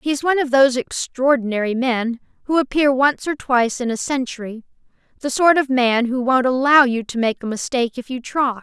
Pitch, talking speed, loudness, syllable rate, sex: 255 Hz, 195 wpm, -18 LUFS, 5.4 syllables/s, female